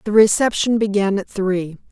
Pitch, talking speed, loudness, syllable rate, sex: 205 Hz, 155 wpm, -18 LUFS, 4.7 syllables/s, female